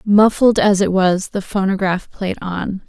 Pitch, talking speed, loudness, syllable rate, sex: 195 Hz, 165 wpm, -17 LUFS, 4.0 syllables/s, female